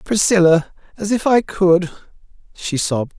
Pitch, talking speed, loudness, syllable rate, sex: 185 Hz, 115 wpm, -16 LUFS, 4.5 syllables/s, male